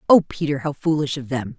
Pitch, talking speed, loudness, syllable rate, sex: 145 Hz, 225 wpm, -21 LUFS, 5.8 syllables/s, female